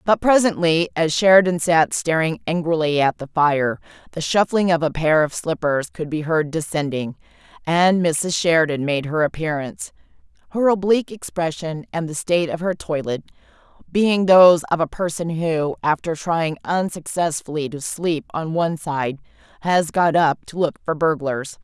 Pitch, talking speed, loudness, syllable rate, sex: 165 Hz, 160 wpm, -20 LUFS, 4.8 syllables/s, female